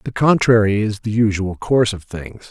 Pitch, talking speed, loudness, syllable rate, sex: 110 Hz, 190 wpm, -17 LUFS, 5.0 syllables/s, male